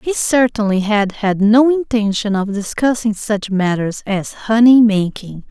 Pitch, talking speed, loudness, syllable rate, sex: 215 Hz, 140 wpm, -15 LUFS, 4.1 syllables/s, female